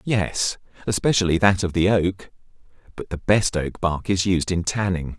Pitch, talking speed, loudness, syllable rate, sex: 95 Hz, 175 wpm, -22 LUFS, 4.5 syllables/s, male